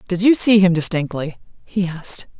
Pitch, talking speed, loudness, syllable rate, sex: 180 Hz, 175 wpm, -17 LUFS, 5.2 syllables/s, female